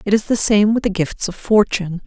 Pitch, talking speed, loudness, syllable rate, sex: 200 Hz, 260 wpm, -17 LUFS, 5.7 syllables/s, female